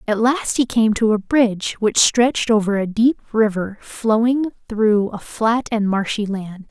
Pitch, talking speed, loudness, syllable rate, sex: 220 Hz, 180 wpm, -18 LUFS, 4.1 syllables/s, female